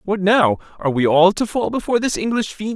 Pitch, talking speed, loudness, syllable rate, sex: 200 Hz, 240 wpm, -18 LUFS, 5.8 syllables/s, male